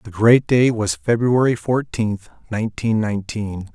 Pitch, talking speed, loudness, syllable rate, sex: 110 Hz, 130 wpm, -19 LUFS, 4.4 syllables/s, male